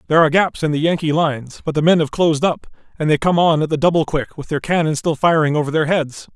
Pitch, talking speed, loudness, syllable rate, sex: 155 Hz, 275 wpm, -17 LUFS, 6.6 syllables/s, male